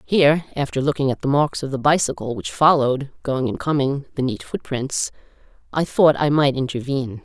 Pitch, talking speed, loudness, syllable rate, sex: 140 Hz, 180 wpm, -20 LUFS, 5.5 syllables/s, female